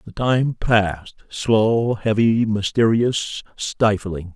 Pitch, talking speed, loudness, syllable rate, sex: 110 Hz, 95 wpm, -19 LUFS, 3.0 syllables/s, male